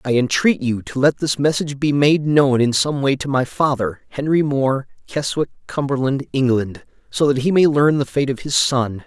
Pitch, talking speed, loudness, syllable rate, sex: 135 Hz, 205 wpm, -18 LUFS, 4.8 syllables/s, male